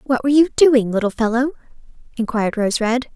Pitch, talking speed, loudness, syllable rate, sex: 245 Hz, 170 wpm, -17 LUFS, 6.2 syllables/s, female